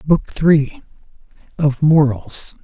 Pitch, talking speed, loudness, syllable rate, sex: 150 Hz, 90 wpm, -16 LUFS, 2.9 syllables/s, male